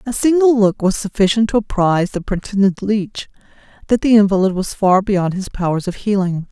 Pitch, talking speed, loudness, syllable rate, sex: 200 Hz, 185 wpm, -16 LUFS, 5.4 syllables/s, female